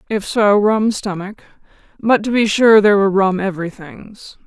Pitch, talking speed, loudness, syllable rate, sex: 205 Hz, 160 wpm, -15 LUFS, 5.1 syllables/s, female